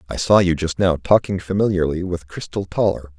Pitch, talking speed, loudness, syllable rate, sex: 90 Hz, 190 wpm, -19 LUFS, 5.5 syllables/s, male